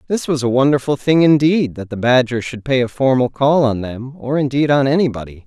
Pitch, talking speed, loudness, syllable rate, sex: 130 Hz, 220 wpm, -16 LUFS, 5.5 syllables/s, male